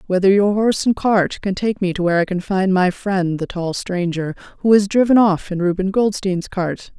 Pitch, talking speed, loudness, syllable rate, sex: 190 Hz, 225 wpm, -18 LUFS, 5.1 syllables/s, female